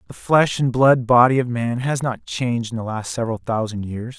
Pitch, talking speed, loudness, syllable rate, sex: 120 Hz, 230 wpm, -19 LUFS, 5.3 syllables/s, male